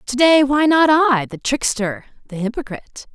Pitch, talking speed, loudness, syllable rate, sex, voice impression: 260 Hz, 170 wpm, -16 LUFS, 4.8 syllables/s, female, very feminine, slightly young, slightly adult-like, thin, tensed, powerful, very bright, hard, clear, very fluent, slightly cute, cool, slightly intellectual, very refreshing, very sincere, slightly calm, very friendly, reassuring, slightly unique, wild, slightly sweet, very lively, very strict, very intense